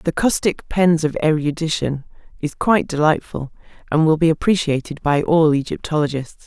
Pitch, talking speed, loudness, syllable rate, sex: 155 Hz, 140 wpm, -18 LUFS, 5.1 syllables/s, female